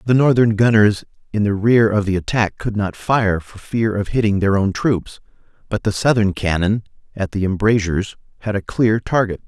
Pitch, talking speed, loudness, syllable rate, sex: 105 Hz, 190 wpm, -18 LUFS, 5.0 syllables/s, male